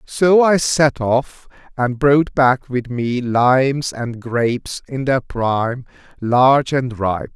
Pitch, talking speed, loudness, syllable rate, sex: 130 Hz, 145 wpm, -17 LUFS, 3.4 syllables/s, male